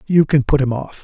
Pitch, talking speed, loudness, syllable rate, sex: 140 Hz, 290 wpm, -16 LUFS, 5.8 syllables/s, male